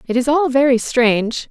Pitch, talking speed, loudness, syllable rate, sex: 255 Hz, 200 wpm, -15 LUFS, 5.1 syllables/s, female